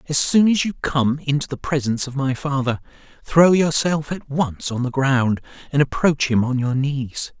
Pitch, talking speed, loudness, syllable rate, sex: 140 Hz, 195 wpm, -20 LUFS, 4.6 syllables/s, male